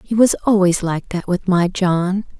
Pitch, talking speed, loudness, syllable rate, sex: 185 Hz, 200 wpm, -17 LUFS, 4.4 syllables/s, female